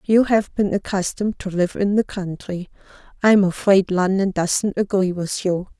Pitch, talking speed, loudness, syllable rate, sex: 190 Hz, 175 wpm, -20 LUFS, 4.7 syllables/s, female